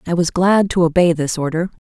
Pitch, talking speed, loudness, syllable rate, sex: 170 Hz, 225 wpm, -16 LUFS, 5.7 syllables/s, female